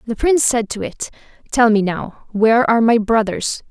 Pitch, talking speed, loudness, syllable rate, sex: 225 Hz, 195 wpm, -16 LUFS, 5.2 syllables/s, female